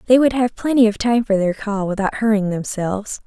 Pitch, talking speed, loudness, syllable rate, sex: 215 Hz, 220 wpm, -18 LUFS, 5.6 syllables/s, female